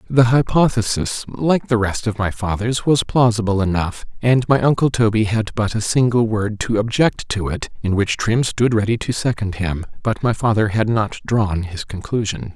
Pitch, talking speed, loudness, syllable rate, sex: 110 Hz, 180 wpm, -19 LUFS, 4.7 syllables/s, male